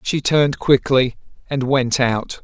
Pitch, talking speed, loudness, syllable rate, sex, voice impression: 130 Hz, 150 wpm, -18 LUFS, 4.0 syllables/s, male, masculine, middle-aged, slightly powerful, slightly bright, raspy, mature, friendly, wild, lively, intense